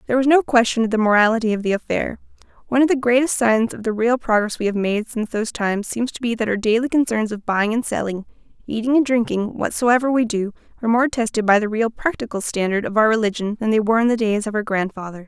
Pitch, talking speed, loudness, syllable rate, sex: 225 Hz, 245 wpm, -19 LUFS, 6.6 syllables/s, female